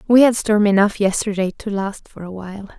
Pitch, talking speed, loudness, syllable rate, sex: 205 Hz, 195 wpm, -17 LUFS, 5.5 syllables/s, female